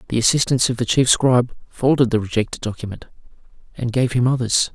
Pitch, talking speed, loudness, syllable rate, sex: 120 Hz, 175 wpm, -19 LUFS, 6.1 syllables/s, male